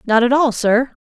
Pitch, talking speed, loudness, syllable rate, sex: 245 Hz, 235 wpm, -15 LUFS, 5.0 syllables/s, female